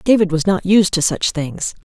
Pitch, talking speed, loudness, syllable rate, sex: 185 Hz, 225 wpm, -16 LUFS, 4.8 syllables/s, female